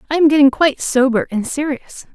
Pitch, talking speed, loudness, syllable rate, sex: 280 Hz, 195 wpm, -15 LUFS, 5.8 syllables/s, female